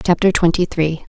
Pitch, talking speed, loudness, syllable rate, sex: 170 Hz, 155 wpm, -17 LUFS, 5.3 syllables/s, female